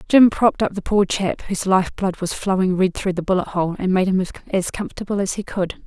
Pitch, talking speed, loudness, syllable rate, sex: 190 Hz, 245 wpm, -20 LUFS, 6.0 syllables/s, female